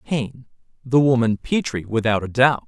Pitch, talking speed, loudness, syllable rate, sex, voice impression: 120 Hz, 135 wpm, -20 LUFS, 5.5 syllables/s, male, masculine, adult-like, slightly fluent, slightly cool, refreshing, sincere